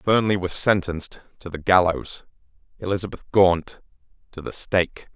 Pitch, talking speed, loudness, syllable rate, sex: 90 Hz, 130 wpm, -22 LUFS, 4.9 syllables/s, male